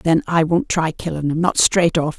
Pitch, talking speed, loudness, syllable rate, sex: 170 Hz, 220 wpm, -18 LUFS, 4.7 syllables/s, female